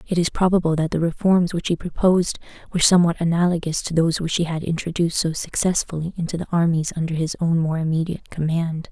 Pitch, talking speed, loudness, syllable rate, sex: 170 Hz, 195 wpm, -21 LUFS, 6.5 syllables/s, female